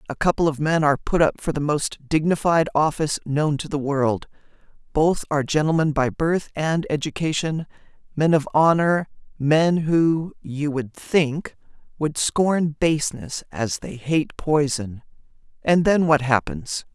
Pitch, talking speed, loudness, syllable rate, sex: 155 Hz, 140 wpm, -21 LUFS, 4.3 syllables/s, female